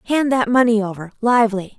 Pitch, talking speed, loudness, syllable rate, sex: 225 Hz, 170 wpm, -17 LUFS, 6.0 syllables/s, female